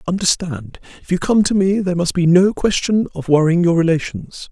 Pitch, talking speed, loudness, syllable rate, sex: 175 Hz, 210 wpm, -16 LUFS, 5.6 syllables/s, male